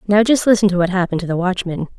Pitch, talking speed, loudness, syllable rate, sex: 190 Hz, 270 wpm, -16 LUFS, 7.3 syllables/s, female